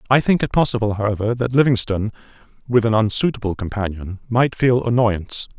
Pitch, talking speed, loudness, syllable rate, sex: 115 Hz, 150 wpm, -19 LUFS, 6.0 syllables/s, male